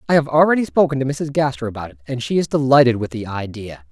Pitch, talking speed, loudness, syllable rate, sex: 130 Hz, 245 wpm, -18 LUFS, 6.6 syllables/s, male